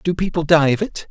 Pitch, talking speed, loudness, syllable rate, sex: 165 Hz, 270 wpm, -17 LUFS, 5.6 syllables/s, male